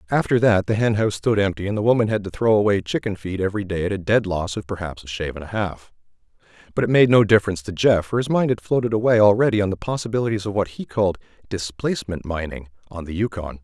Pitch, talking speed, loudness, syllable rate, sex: 100 Hz, 240 wpm, -21 LUFS, 6.8 syllables/s, male